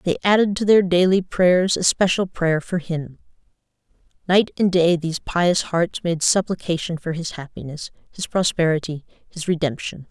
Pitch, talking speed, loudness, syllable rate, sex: 175 Hz, 155 wpm, -20 LUFS, 4.8 syllables/s, female